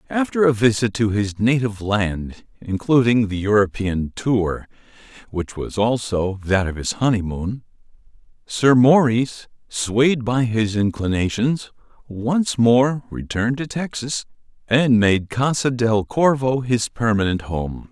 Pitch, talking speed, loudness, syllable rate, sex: 115 Hz, 115 wpm, -20 LUFS, 4.0 syllables/s, male